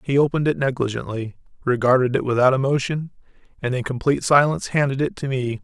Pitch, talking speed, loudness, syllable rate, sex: 135 Hz, 170 wpm, -21 LUFS, 6.5 syllables/s, male